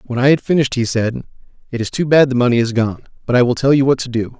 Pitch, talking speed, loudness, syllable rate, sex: 125 Hz, 300 wpm, -16 LUFS, 7.1 syllables/s, male